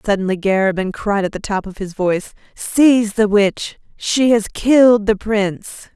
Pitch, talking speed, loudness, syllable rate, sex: 205 Hz, 170 wpm, -16 LUFS, 4.7 syllables/s, female